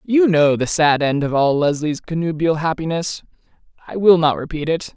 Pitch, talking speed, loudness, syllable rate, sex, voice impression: 160 Hz, 180 wpm, -18 LUFS, 5.0 syllables/s, male, masculine, adult-like, tensed, powerful, bright, clear, nasal, calm, friendly, slightly reassuring, lively, slightly modest